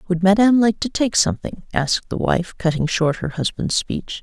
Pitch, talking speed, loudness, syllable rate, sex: 185 Hz, 200 wpm, -19 LUFS, 5.3 syllables/s, female